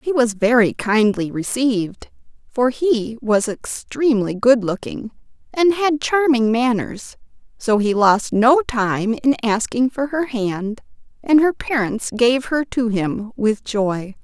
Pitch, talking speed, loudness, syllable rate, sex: 235 Hz, 145 wpm, -18 LUFS, 3.7 syllables/s, female